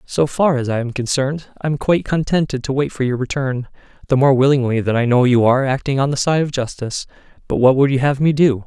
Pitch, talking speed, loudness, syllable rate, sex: 135 Hz, 240 wpm, -17 LUFS, 6.1 syllables/s, male